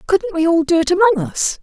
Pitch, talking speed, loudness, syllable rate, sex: 330 Hz, 260 wpm, -16 LUFS, 5.4 syllables/s, female